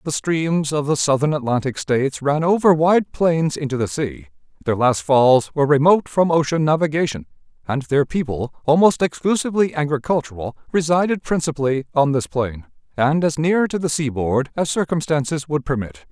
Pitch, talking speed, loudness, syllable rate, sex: 145 Hz, 160 wpm, -19 LUFS, 5.3 syllables/s, male